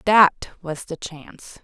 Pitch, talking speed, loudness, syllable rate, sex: 175 Hz, 145 wpm, -21 LUFS, 3.7 syllables/s, female